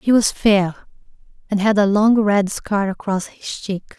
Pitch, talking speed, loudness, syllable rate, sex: 200 Hz, 180 wpm, -18 LUFS, 4.1 syllables/s, female